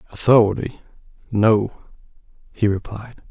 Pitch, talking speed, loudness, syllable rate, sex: 105 Hz, 55 wpm, -19 LUFS, 4.6 syllables/s, male